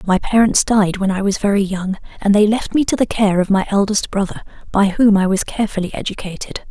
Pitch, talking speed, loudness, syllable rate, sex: 200 Hz, 225 wpm, -17 LUFS, 5.8 syllables/s, female